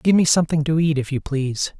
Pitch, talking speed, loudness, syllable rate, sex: 150 Hz, 265 wpm, -20 LUFS, 6.4 syllables/s, male